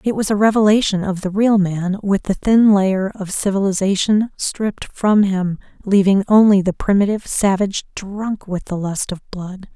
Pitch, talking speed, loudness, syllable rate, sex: 200 Hz, 170 wpm, -17 LUFS, 4.7 syllables/s, female